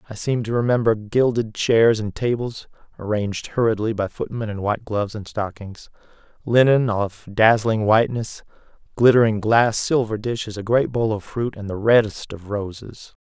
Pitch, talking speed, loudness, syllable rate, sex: 110 Hz, 160 wpm, -20 LUFS, 3.8 syllables/s, male